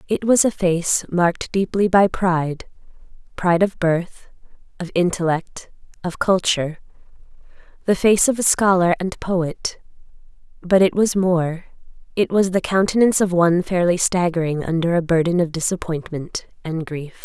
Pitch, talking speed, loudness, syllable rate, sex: 180 Hz, 140 wpm, -19 LUFS, 4.8 syllables/s, female